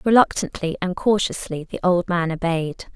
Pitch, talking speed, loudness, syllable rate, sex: 180 Hz, 140 wpm, -22 LUFS, 4.8 syllables/s, female